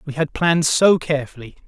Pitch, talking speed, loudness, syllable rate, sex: 150 Hz, 180 wpm, -18 LUFS, 6.1 syllables/s, male